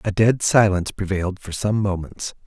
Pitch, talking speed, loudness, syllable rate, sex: 100 Hz, 170 wpm, -21 LUFS, 5.3 syllables/s, male